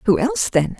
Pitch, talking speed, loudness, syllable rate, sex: 230 Hz, 225 wpm, -19 LUFS, 6.2 syllables/s, female